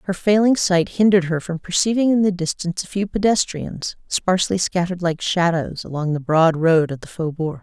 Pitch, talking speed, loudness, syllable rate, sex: 175 Hz, 190 wpm, -19 LUFS, 5.4 syllables/s, female